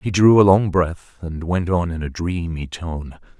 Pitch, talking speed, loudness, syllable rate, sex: 85 Hz, 210 wpm, -19 LUFS, 4.2 syllables/s, male